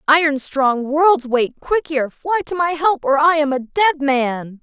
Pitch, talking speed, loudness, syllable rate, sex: 295 Hz, 205 wpm, -17 LUFS, 4.0 syllables/s, female